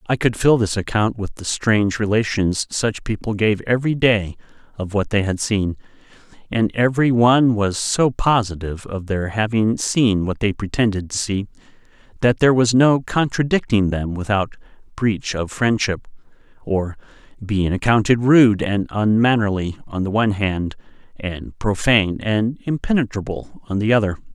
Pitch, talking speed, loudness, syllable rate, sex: 110 Hz, 150 wpm, -19 LUFS, 4.7 syllables/s, male